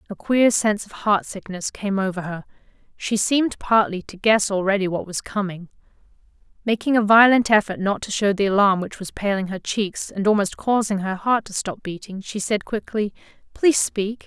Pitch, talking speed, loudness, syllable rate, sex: 205 Hz, 185 wpm, -21 LUFS, 5.2 syllables/s, female